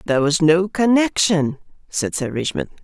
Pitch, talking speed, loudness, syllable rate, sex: 160 Hz, 150 wpm, -18 LUFS, 4.8 syllables/s, male